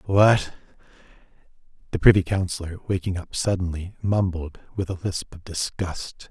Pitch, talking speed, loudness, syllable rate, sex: 90 Hz, 125 wpm, -24 LUFS, 4.8 syllables/s, male